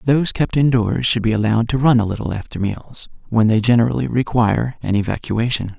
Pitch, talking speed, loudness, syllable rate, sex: 115 Hz, 195 wpm, -18 LUFS, 6.0 syllables/s, male